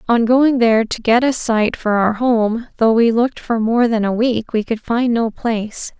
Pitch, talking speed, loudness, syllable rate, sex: 230 Hz, 230 wpm, -16 LUFS, 4.6 syllables/s, female